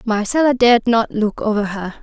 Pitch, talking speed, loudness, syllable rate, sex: 225 Hz, 175 wpm, -16 LUFS, 5.3 syllables/s, female